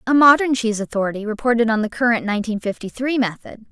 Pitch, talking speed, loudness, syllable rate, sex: 230 Hz, 195 wpm, -19 LUFS, 5.9 syllables/s, female